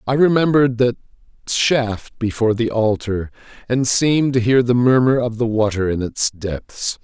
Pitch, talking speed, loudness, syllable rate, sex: 120 Hz, 160 wpm, -18 LUFS, 4.7 syllables/s, male